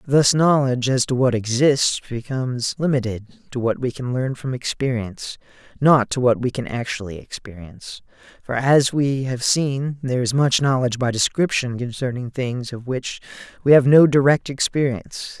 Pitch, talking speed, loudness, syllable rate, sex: 130 Hz, 160 wpm, -20 LUFS, 5.0 syllables/s, male